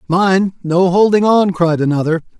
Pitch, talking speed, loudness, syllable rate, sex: 175 Hz, 150 wpm, -14 LUFS, 4.5 syllables/s, male